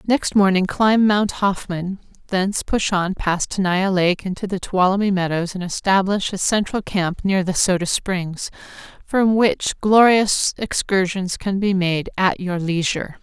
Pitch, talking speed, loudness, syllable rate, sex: 190 Hz, 155 wpm, -19 LUFS, 4.3 syllables/s, female